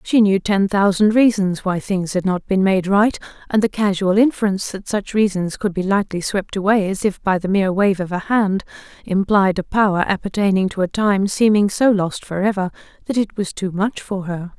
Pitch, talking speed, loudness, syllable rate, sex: 195 Hz, 210 wpm, -18 LUFS, 5.2 syllables/s, female